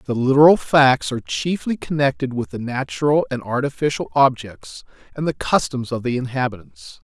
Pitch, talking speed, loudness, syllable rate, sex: 125 Hz, 150 wpm, -19 LUFS, 5.2 syllables/s, male